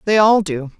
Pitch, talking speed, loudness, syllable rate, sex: 190 Hz, 225 wpm, -15 LUFS, 4.9 syllables/s, female